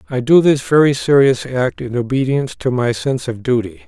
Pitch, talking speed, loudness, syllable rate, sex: 130 Hz, 200 wpm, -16 LUFS, 5.5 syllables/s, male